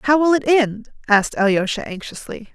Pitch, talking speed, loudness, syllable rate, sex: 240 Hz, 165 wpm, -18 LUFS, 5.1 syllables/s, female